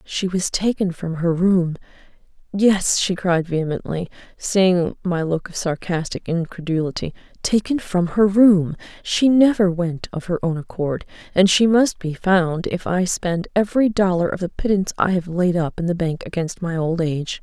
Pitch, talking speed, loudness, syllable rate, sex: 180 Hz, 175 wpm, -20 LUFS, 4.7 syllables/s, female